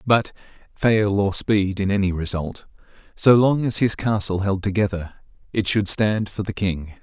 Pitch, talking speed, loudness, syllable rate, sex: 100 Hz, 170 wpm, -21 LUFS, 4.4 syllables/s, male